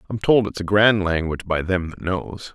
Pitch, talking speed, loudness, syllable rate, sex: 95 Hz, 235 wpm, -20 LUFS, 5.1 syllables/s, male